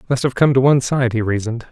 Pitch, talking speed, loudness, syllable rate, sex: 125 Hz, 280 wpm, -16 LUFS, 7.3 syllables/s, male